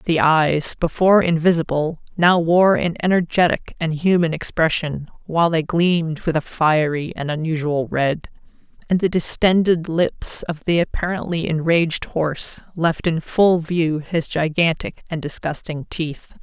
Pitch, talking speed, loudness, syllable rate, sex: 165 Hz, 140 wpm, -19 LUFS, 4.3 syllables/s, female